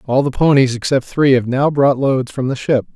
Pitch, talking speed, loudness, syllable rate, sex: 135 Hz, 245 wpm, -15 LUFS, 5.1 syllables/s, male